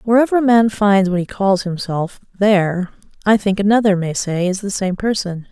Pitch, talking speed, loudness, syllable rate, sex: 200 Hz, 195 wpm, -17 LUFS, 5.1 syllables/s, female